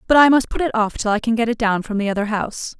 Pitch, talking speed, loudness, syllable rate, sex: 225 Hz, 345 wpm, -19 LUFS, 6.9 syllables/s, female